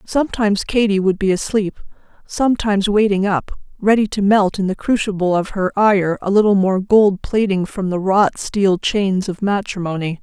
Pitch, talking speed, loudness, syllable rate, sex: 200 Hz, 170 wpm, -17 LUFS, 5.0 syllables/s, female